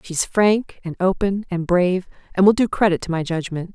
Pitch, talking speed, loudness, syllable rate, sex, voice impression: 185 Hz, 210 wpm, -20 LUFS, 5.2 syllables/s, female, feminine, adult-like, slightly fluent, slightly intellectual, slightly sweet